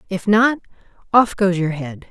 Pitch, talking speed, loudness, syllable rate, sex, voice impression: 195 Hz, 170 wpm, -17 LUFS, 4.5 syllables/s, female, very feminine, very adult-like, elegant, slightly sweet